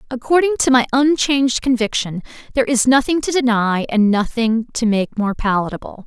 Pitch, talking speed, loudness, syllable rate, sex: 240 Hz, 160 wpm, -17 LUFS, 5.5 syllables/s, female